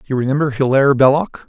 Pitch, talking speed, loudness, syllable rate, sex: 135 Hz, 160 wpm, -15 LUFS, 6.8 syllables/s, male